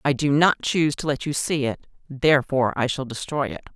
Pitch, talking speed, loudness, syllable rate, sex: 140 Hz, 225 wpm, -22 LUFS, 5.9 syllables/s, female